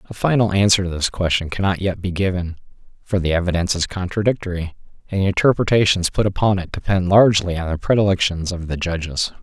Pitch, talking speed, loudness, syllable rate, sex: 95 Hz, 185 wpm, -19 LUFS, 6.3 syllables/s, male